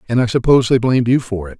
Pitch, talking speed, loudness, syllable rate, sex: 120 Hz, 300 wpm, -15 LUFS, 7.8 syllables/s, male